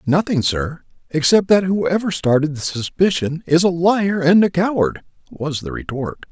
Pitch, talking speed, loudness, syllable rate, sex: 165 Hz, 160 wpm, -18 LUFS, 4.5 syllables/s, male